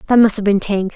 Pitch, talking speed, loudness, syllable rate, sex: 210 Hz, 315 wpm, -15 LUFS, 6.6 syllables/s, female